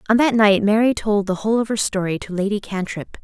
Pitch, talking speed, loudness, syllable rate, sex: 205 Hz, 240 wpm, -19 LUFS, 6.0 syllables/s, female